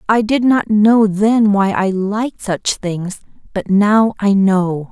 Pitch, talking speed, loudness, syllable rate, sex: 205 Hz, 170 wpm, -14 LUFS, 3.5 syllables/s, female